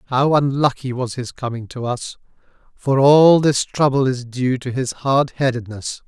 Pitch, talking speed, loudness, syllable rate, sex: 130 Hz, 170 wpm, -18 LUFS, 4.4 syllables/s, male